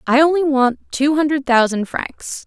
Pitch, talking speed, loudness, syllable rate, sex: 275 Hz, 170 wpm, -17 LUFS, 4.5 syllables/s, female